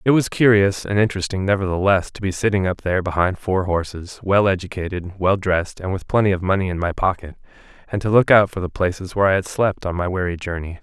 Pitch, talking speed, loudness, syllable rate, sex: 95 Hz, 225 wpm, -20 LUFS, 6.2 syllables/s, male